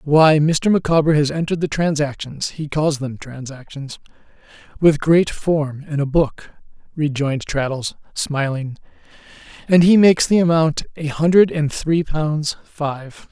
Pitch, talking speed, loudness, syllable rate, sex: 150 Hz, 130 wpm, -18 LUFS, 4.3 syllables/s, male